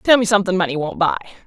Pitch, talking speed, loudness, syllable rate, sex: 190 Hz, 245 wpm, -18 LUFS, 7.8 syllables/s, female